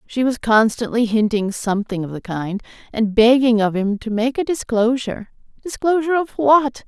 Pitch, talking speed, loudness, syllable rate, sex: 235 Hz, 155 wpm, -18 LUFS, 5.1 syllables/s, female